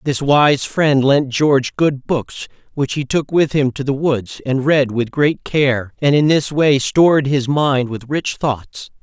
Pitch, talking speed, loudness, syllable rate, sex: 140 Hz, 200 wpm, -16 LUFS, 3.8 syllables/s, male